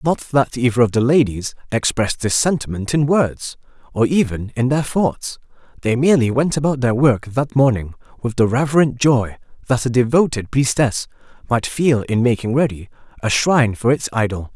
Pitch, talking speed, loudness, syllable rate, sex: 125 Hz, 175 wpm, -18 LUFS, 5.0 syllables/s, male